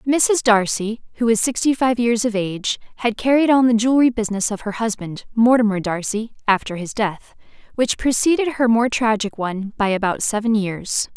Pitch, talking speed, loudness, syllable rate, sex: 225 Hz, 175 wpm, -19 LUFS, 5.2 syllables/s, female